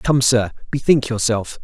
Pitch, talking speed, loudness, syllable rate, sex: 120 Hz, 145 wpm, -18 LUFS, 4.4 syllables/s, male